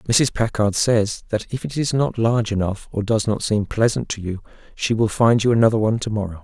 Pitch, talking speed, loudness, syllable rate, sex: 110 Hz, 235 wpm, -20 LUFS, 5.5 syllables/s, male